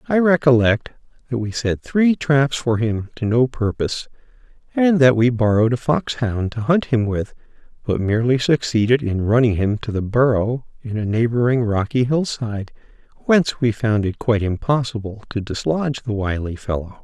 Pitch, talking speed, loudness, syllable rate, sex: 120 Hz, 175 wpm, -19 LUFS, 5.0 syllables/s, male